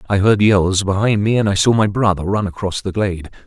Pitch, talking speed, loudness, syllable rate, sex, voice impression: 100 Hz, 240 wpm, -16 LUFS, 5.8 syllables/s, male, very masculine, middle-aged, very thick, slightly tensed, very powerful, slightly dark, soft, very muffled, fluent, slightly raspy, very cool, intellectual, slightly refreshing, slightly sincere, very calm, very mature, very friendly, very reassuring, very unique, slightly elegant, wild, very sweet, slightly lively, slightly kind, slightly intense, modest